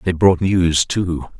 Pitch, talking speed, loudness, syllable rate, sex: 85 Hz, 170 wpm, -17 LUFS, 3.3 syllables/s, male